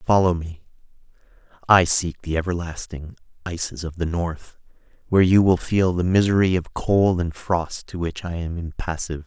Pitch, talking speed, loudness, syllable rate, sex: 85 Hz, 160 wpm, -22 LUFS, 4.8 syllables/s, male